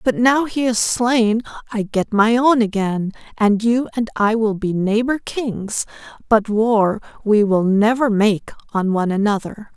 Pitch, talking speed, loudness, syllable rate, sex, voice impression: 220 Hz, 165 wpm, -18 LUFS, 4.0 syllables/s, female, feminine, slightly young, slightly adult-like, slightly thin, tensed, slightly powerful, bright, slightly hard, clear, fluent, slightly cool, intellectual, slightly refreshing, sincere, slightly calm, slightly friendly, slightly reassuring, slightly elegant, lively, slightly strict